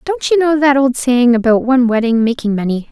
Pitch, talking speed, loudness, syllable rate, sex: 255 Hz, 225 wpm, -13 LUFS, 5.7 syllables/s, female